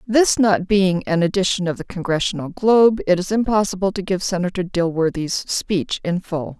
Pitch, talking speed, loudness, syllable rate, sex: 185 Hz, 175 wpm, -19 LUFS, 5.0 syllables/s, female